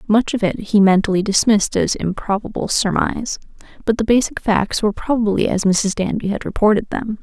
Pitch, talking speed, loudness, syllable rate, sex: 210 Hz, 175 wpm, -18 LUFS, 5.7 syllables/s, female